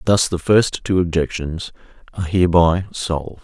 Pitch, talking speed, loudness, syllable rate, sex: 90 Hz, 140 wpm, -18 LUFS, 5.0 syllables/s, male